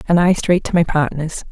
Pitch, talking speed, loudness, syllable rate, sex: 165 Hz, 240 wpm, -17 LUFS, 5.3 syllables/s, female